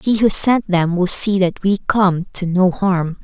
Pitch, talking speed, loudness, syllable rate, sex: 190 Hz, 220 wpm, -16 LUFS, 4.0 syllables/s, female